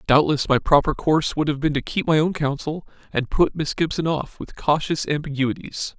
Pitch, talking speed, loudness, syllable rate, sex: 150 Hz, 200 wpm, -22 LUFS, 5.2 syllables/s, male